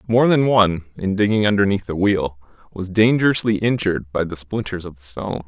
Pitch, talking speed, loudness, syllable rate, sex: 100 Hz, 175 wpm, -19 LUFS, 5.6 syllables/s, male